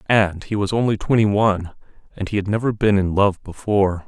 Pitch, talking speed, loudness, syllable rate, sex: 100 Hz, 205 wpm, -19 LUFS, 5.8 syllables/s, male